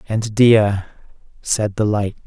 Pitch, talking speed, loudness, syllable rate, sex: 105 Hz, 135 wpm, -17 LUFS, 3.6 syllables/s, male